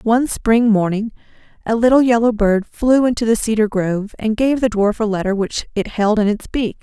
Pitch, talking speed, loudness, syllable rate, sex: 220 Hz, 210 wpm, -17 LUFS, 5.3 syllables/s, female